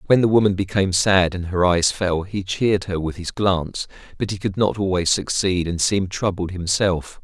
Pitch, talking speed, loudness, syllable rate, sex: 95 Hz, 205 wpm, -20 LUFS, 5.2 syllables/s, male